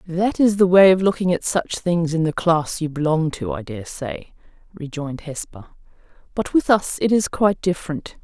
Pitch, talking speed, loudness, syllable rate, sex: 170 Hz, 195 wpm, -20 LUFS, 5.0 syllables/s, female